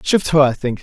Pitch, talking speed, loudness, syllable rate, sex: 140 Hz, 290 wpm, -15 LUFS, 5.5 syllables/s, male